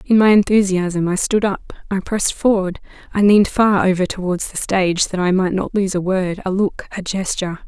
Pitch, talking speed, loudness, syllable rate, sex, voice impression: 190 Hz, 210 wpm, -17 LUFS, 5.4 syllables/s, female, very feminine, very adult-like, middle-aged, very thin, tensed, slightly powerful, bright, slightly hard, very clear, very fluent, slightly cool, very intellectual, very refreshing, very sincere, calm, slightly friendly, reassuring, slightly unique, slightly lively, strict, sharp, slightly modest